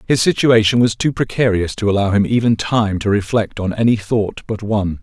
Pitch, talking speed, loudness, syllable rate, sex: 110 Hz, 205 wpm, -16 LUFS, 5.4 syllables/s, male